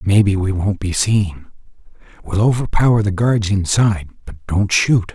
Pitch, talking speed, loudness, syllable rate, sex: 100 Hz, 150 wpm, -17 LUFS, 4.7 syllables/s, male